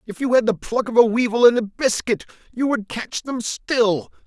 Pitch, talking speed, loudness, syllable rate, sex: 225 Hz, 225 wpm, -20 LUFS, 4.8 syllables/s, male